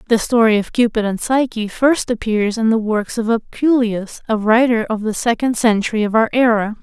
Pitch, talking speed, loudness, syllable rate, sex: 225 Hz, 195 wpm, -16 LUFS, 5.1 syllables/s, female